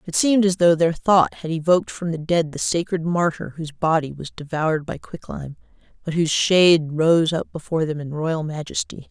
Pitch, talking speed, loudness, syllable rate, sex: 165 Hz, 200 wpm, -20 LUFS, 5.5 syllables/s, female